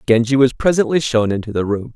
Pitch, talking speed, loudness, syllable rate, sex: 125 Hz, 215 wpm, -16 LUFS, 6.2 syllables/s, male